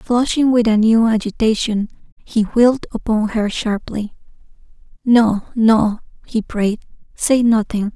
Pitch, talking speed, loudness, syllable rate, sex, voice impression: 220 Hz, 120 wpm, -17 LUFS, 4.0 syllables/s, female, feminine, slightly adult-like, slightly cute, slightly refreshing, friendly, slightly reassuring, kind